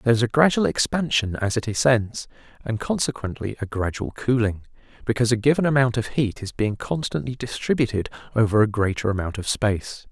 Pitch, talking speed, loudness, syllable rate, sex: 115 Hz, 170 wpm, -23 LUFS, 5.9 syllables/s, male